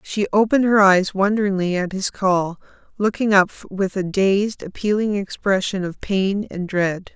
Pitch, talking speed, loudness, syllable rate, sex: 195 Hz, 160 wpm, -19 LUFS, 4.5 syllables/s, female